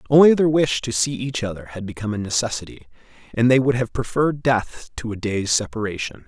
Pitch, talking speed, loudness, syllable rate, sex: 115 Hz, 200 wpm, -21 LUFS, 5.9 syllables/s, male